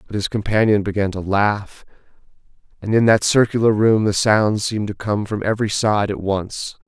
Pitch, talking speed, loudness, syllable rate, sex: 105 Hz, 185 wpm, -18 LUFS, 5.1 syllables/s, male